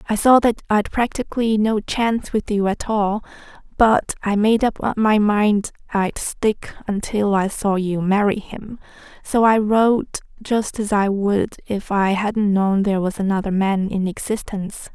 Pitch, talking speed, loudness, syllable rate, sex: 205 Hz, 170 wpm, -19 LUFS, 4.3 syllables/s, female